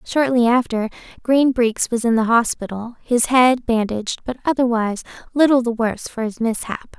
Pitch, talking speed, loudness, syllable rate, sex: 235 Hz, 165 wpm, -19 LUFS, 5.1 syllables/s, female